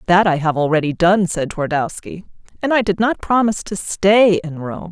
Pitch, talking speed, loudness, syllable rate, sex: 185 Hz, 195 wpm, -17 LUFS, 5.1 syllables/s, female